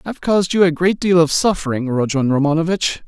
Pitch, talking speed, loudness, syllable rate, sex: 165 Hz, 195 wpm, -16 LUFS, 6.1 syllables/s, male